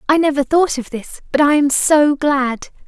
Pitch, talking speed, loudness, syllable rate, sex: 285 Hz, 210 wpm, -15 LUFS, 4.5 syllables/s, female